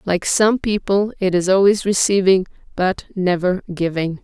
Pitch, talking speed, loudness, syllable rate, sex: 190 Hz, 140 wpm, -18 LUFS, 4.5 syllables/s, female